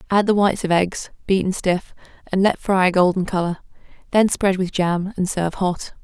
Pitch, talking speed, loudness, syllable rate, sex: 185 Hz, 200 wpm, -20 LUFS, 5.2 syllables/s, female